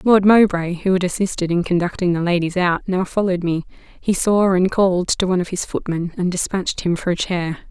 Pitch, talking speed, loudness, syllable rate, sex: 180 Hz, 220 wpm, -19 LUFS, 5.8 syllables/s, female